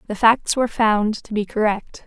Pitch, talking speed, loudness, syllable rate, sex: 220 Hz, 205 wpm, -19 LUFS, 4.8 syllables/s, female